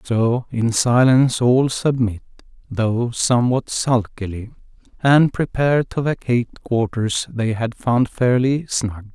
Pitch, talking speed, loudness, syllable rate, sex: 120 Hz, 120 wpm, -19 LUFS, 3.9 syllables/s, male